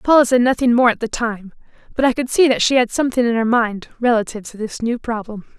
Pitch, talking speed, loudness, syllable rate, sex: 235 Hz, 245 wpm, -17 LUFS, 6.3 syllables/s, female